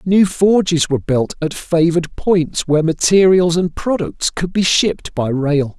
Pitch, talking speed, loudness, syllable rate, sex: 170 Hz, 165 wpm, -15 LUFS, 4.5 syllables/s, male